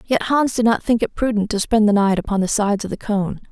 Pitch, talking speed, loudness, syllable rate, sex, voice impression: 215 Hz, 290 wpm, -18 LUFS, 6.0 syllables/s, female, very feminine, young, slightly adult-like, thin, slightly relaxed, slightly weak, slightly bright, soft, very clear, very fluent, slightly raspy, very cute, slightly cool, intellectual, very refreshing, sincere, slightly calm, friendly, very reassuring, unique, elegant, slightly wild, sweet, lively, kind, slightly intense, slightly sharp, slightly modest, light